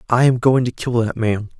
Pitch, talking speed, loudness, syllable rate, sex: 120 Hz, 265 wpm, -18 LUFS, 5.2 syllables/s, male